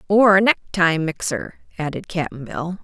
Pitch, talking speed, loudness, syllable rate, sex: 175 Hz, 150 wpm, -20 LUFS, 4.2 syllables/s, female